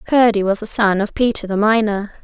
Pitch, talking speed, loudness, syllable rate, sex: 210 Hz, 215 wpm, -17 LUFS, 5.5 syllables/s, female